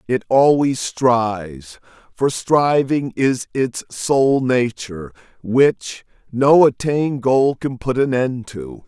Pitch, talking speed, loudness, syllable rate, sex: 130 Hz, 120 wpm, -17 LUFS, 3.3 syllables/s, male